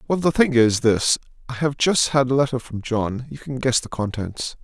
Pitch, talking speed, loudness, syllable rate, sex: 130 Hz, 235 wpm, -21 LUFS, 4.9 syllables/s, male